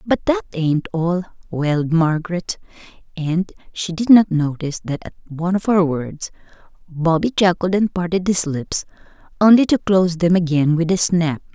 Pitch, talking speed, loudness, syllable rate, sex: 175 Hz, 160 wpm, -18 LUFS, 4.8 syllables/s, female